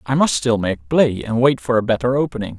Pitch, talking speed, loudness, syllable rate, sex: 120 Hz, 255 wpm, -18 LUFS, 5.7 syllables/s, male